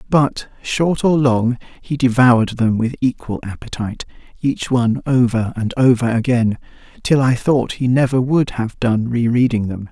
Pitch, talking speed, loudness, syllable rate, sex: 125 Hz, 165 wpm, -17 LUFS, 4.6 syllables/s, male